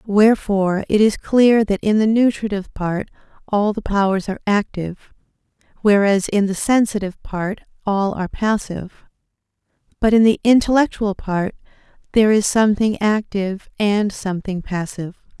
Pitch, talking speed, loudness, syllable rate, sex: 205 Hz, 130 wpm, -18 LUFS, 5.3 syllables/s, female